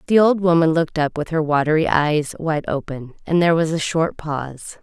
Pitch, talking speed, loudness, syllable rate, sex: 160 Hz, 210 wpm, -19 LUFS, 5.4 syllables/s, female